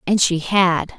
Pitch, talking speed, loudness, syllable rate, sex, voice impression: 180 Hz, 185 wpm, -17 LUFS, 3.8 syllables/s, female, very feminine, slightly young, thin, tensed, slightly powerful, bright, hard, very clear, very fluent, very cute, intellectual, very refreshing, sincere, slightly calm, very friendly, reassuring, very unique, very elegant, slightly wild, very sweet, very lively, strict, intense, slightly sharp